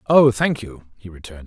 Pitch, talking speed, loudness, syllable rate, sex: 110 Hz, 205 wpm, -18 LUFS, 5.0 syllables/s, male